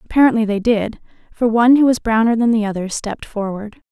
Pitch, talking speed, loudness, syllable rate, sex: 225 Hz, 200 wpm, -16 LUFS, 6.1 syllables/s, female